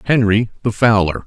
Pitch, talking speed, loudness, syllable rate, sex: 110 Hz, 145 wpm, -15 LUFS, 5.4 syllables/s, male